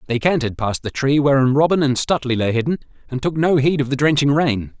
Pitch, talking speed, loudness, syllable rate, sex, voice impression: 135 Hz, 240 wpm, -18 LUFS, 6.3 syllables/s, male, masculine, slightly young, slightly adult-like, slightly thick, slightly tensed, slightly weak, slightly dark, slightly hard, slightly muffled, fluent, slightly cool, slightly intellectual, refreshing, sincere, slightly calm, slightly friendly, slightly reassuring, very unique, wild, slightly sweet, lively, kind, slightly intense, sharp, slightly light